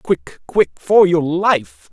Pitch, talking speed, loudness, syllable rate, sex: 175 Hz, 125 wpm, -16 LUFS, 2.8 syllables/s, male